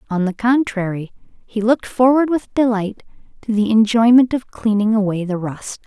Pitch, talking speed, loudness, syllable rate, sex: 220 Hz, 165 wpm, -17 LUFS, 5.0 syllables/s, female